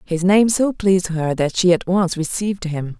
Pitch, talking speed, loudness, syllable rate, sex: 180 Hz, 220 wpm, -18 LUFS, 4.8 syllables/s, female